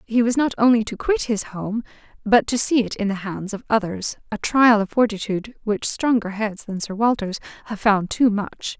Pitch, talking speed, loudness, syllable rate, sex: 220 Hz, 210 wpm, -21 LUFS, 5.0 syllables/s, female